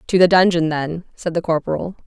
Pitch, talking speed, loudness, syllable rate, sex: 170 Hz, 205 wpm, -18 LUFS, 5.7 syllables/s, female